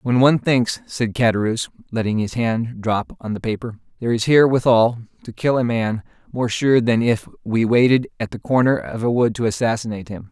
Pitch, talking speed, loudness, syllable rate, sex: 120 Hz, 205 wpm, -19 LUFS, 5.8 syllables/s, male